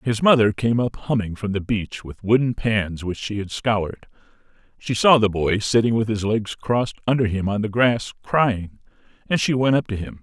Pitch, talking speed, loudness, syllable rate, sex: 110 Hz, 210 wpm, -21 LUFS, 4.9 syllables/s, male